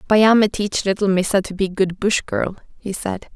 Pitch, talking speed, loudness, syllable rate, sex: 200 Hz, 195 wpm, -19 LUFS, 4.8 syllables/s, female